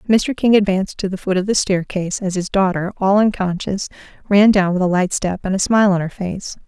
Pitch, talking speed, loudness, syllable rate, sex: 190 Hz, 235 wpm, -17 LUFS, 5.7 syllables/s, female